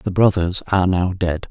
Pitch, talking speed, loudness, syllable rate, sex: 90 Hz, 200 wpm, -19 LUFS, 4.9 syllables/s, male